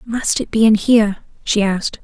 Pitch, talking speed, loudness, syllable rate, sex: 215 Hz, 205 wpm, -16 LUFS, 5.3 syllables/s, female